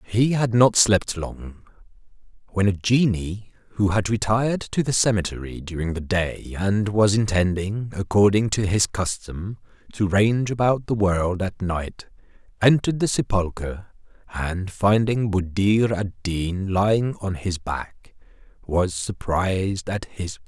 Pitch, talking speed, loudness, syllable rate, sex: 100 Hz, 140 wpm, -22 LUFS, 4.2 syllables/s, male